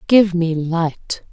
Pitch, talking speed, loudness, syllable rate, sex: 175 Hz, 135 wpm, -18 LUFS, 2.7 syllables/s, female